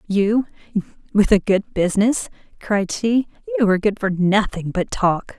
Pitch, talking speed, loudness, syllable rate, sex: 205 Hz, 155 wpm, -20 LUFS, 4.6 syllables/s, female